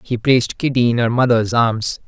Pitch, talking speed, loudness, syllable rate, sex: 120 Hz, 205 wpm, -16 LUFS, 5.2 syllables/s, male